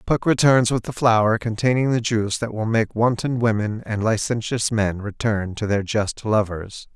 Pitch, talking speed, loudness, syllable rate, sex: 110 Hz, 180 wpm, -21 LUFS, 4.7 syllables/s, male